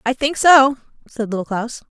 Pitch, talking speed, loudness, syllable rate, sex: 250 Hz, 185 wpm, -16 LUFS, 4.8 syllables/s, female